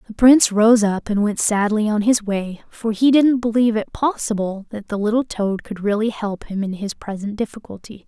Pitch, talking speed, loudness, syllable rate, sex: 215 Hz, 210 wpm, -19 LUFS, 5.1 syllables/s, female